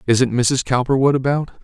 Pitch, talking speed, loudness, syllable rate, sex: 130 Hz, 145 wpm, -17 LUFS, 4.9 syllables/s, male